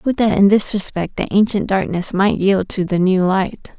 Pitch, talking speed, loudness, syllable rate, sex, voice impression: 195 Hz, 220 wpm, -17 LUFS, 4.6 syllables/s, female, feminine, gender-neutral, slightly young, slightly adult-like, slightly thin, slightly relaxed, slightly weak, slightly dark, slightly hard, slightly clear, fluent, slightly cute, slightly intellectual, slightly sincere, calm, very elegant, slightly strict, slightly sharp